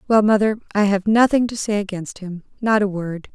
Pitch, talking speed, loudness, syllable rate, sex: 205 Hz, 195 wpm, -19 LUFS, 5.4 syllables/s, female